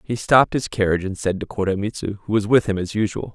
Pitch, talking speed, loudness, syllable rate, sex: 105 Hz, 250 wpm, -21 LUFS, 6.2 syllables/s, male